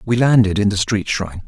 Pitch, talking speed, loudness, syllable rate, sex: 105 Hz, 245 wpm, -17 LUFS, 6.0 syllables/s, male